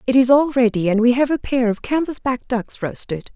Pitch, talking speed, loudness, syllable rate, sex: 245 Hz, 235 wpm, -18 LUFS, 5.3 syllables/s, female